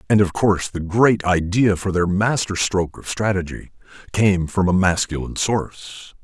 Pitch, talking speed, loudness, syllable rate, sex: 95 Hz, 165 wpm, -19 LUFS, 5.0 syllables/s, male